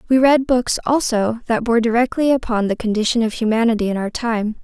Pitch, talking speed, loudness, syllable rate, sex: 230 Hz, 195 wpm, -18 LUFS, 5.6 syllables/s, female